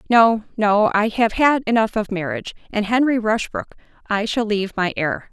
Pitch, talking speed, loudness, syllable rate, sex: 215 Hz, 145 wpm, -19 LUFS, 5.1 syllables/s, female